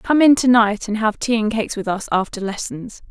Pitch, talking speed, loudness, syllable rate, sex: 220 Hz, 250 wpm, -18 LUFS, 5.4 syllables/s, female